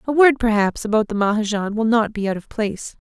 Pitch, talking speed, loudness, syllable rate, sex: 220 Hz, 235 wpm, -19 LUFS, 6.0 syllables/s, female